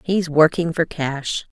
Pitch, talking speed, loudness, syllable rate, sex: 160 Hz, 155 wpm, -20 LUFS, 3.7 syllables/s, female